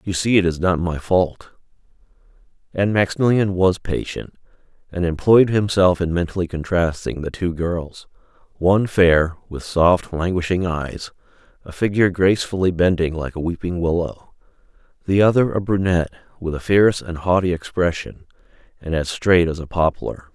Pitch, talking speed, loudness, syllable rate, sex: 90 Hz, 145 wpm, -19 LUFS, 5.0 syllables/s, male